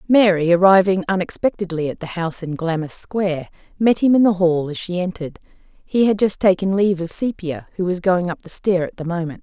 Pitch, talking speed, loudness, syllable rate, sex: 180 Hz, 210 wpm, -19 LUFS, 5.7 syllables/s, female